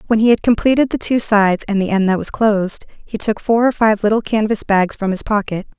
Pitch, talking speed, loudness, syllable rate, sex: 215 Hz, 250 wpm, -16 LUFS, 5.8 syllables/s, female